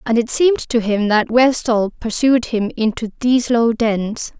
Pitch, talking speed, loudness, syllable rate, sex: 230 Hz, 180 wpm, -17 LUFS, 4.6 syllables/s, female